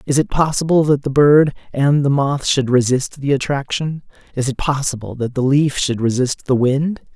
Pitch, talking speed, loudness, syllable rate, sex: 135 Hz, 195 wpm, -17 LUFS, 4.8 syllables/s, male